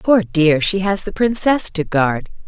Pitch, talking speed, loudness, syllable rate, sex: 180 Hz, 195 wpm, -17 LUFS, 4.0 syllables/s, female